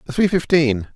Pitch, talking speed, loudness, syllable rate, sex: 150 Hz, 190 wpm, -18 LUFS, 5.1 syllables/s, male